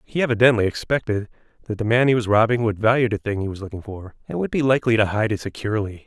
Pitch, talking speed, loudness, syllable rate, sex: 110 Hz, 245 wpm, -21 LUFS, 7.0 syllables/s, male